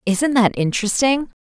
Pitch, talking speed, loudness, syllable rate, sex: 235 Hz, 125 wpm, -18 LUFS, 5.0 syllables/s, female